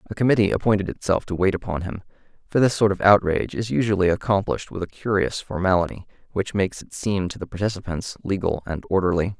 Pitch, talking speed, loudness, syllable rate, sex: 95 Hz, 190 wpm, -22 LUFS, 6.4 syllables/s, male